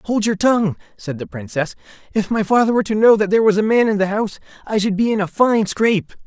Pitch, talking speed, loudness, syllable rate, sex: 205 Hz, 260 wpm, -17 LUFS, 6.5 syllables/s, male